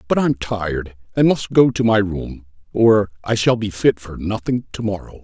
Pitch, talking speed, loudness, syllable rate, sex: 105 Hz, 205 wpm, -19 LUFS, 4.7 syllables/s, male